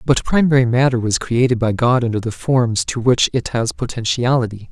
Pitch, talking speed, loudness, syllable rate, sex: 120 Hz, 190 wpm, -17 LUFS, 5.2 syllables/s, male